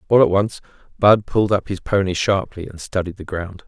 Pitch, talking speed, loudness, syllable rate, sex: 95 Hz, 210 wpm, -19 LUFS, 5.5 syllables/s, male